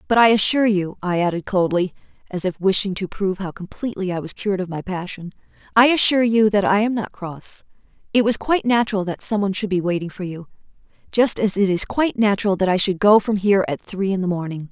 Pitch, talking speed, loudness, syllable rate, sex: 195 Hz, 230 wpm, -20 LUFS, 6.3 syllables/s, female